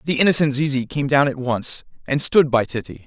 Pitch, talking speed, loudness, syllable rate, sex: 135 Hz, 215 wpm, -19 LUFS, 5.5 syllables/s, male